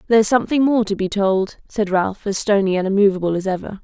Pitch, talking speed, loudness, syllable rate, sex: 200 Hz, 220 wpm, -18 LUFS, 6.2 syllables/s, female